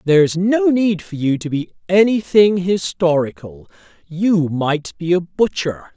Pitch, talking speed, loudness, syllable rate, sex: 175 Hz, 140 wpm, -17 LUFS, 4.0 syllables/s, male